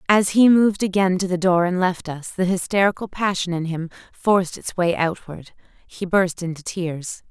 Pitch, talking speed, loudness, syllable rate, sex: 180 Hz, 180 wpm, -20 LUFS, 4.9 syllables/s, female